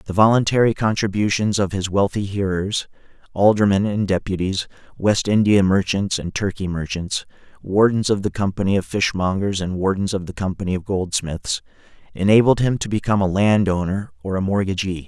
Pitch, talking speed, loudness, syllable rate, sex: 100 Hz, 150 wpm, -20 LUFS, 5.4 syllables/s, male